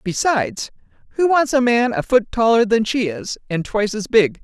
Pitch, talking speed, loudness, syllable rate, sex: 230 Hz, 205 wpm, -18 LUFS, 5.1 syllables/s, female